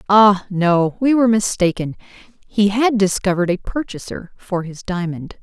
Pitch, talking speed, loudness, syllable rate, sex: 195 Hz, 145 wpm, -18 LUFS, 4.8 syllables/s, female